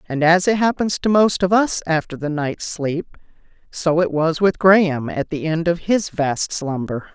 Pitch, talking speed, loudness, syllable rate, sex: 170 Hz, 200 wpm, -19 LUFS, 4.3 syllables/s, female